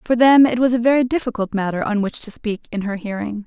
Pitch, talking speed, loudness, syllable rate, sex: 225 Hz, 260 wpm, -18 LUFS, 6.0 syllables/s, female